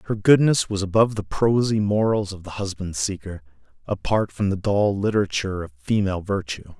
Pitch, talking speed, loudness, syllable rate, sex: 100 Hz, 170 wpm, -22 LUFS, 5.6 syllables/s, male